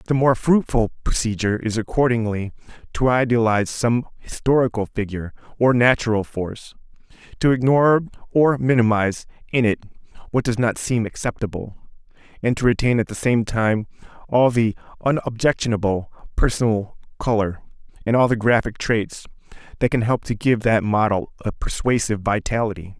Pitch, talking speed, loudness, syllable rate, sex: 115 Hz, 135 wpm, -20 LUFS, 5.4 syllables/s, male